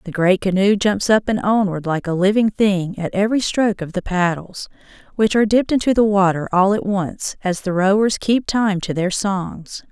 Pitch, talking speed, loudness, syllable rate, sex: 195 Hz, 205 wpm, -18 LUFS, 5.0 syllables/s, female